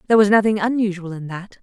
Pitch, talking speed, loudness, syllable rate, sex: 200 Hz, 220 wpm, -18 LUFS, 6.9 syllables/s, female